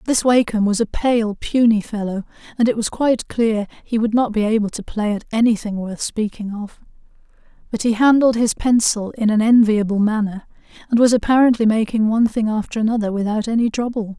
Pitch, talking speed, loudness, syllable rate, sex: 220 Hz, 185 wpm, -18 LUFS, 5.6 syllables/s, female